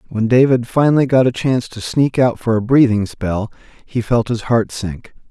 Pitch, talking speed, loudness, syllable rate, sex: 120 Hz, 205 wpm, -16 LUFS, 4.9 syllables/s, male